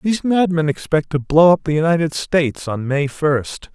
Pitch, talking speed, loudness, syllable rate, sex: 160 Hz, 190 wpm, -17 LUFS, 5.0 syllables/s, male